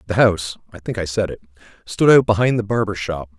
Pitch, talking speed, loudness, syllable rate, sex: 100 Hz, 195 wpm, -18 LUFS, 6.5 syllables/s, male